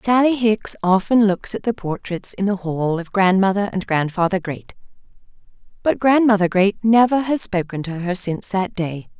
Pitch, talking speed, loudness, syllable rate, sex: 195 Hz, 170 wpm, -19 LUFS, 4.9 syllables/s, female